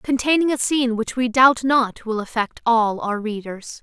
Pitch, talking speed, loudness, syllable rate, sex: 235 Hz, 190 wpm, -19 LUFS, 4.5 syllables/s, female